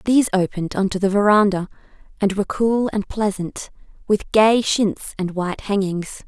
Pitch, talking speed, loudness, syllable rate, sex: 200 Hz, 165 wpm, -20 LUFS, 5.1 syllables/s, female